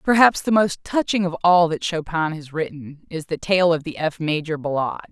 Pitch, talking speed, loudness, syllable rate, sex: 165 Hz, 210 wpm, -20 LUFS, 5.2 syllables/s, female